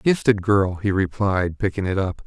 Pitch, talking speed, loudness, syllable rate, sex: 100 Hz, 185 wpm, -21 LUFS, 4.5 syllables/s, male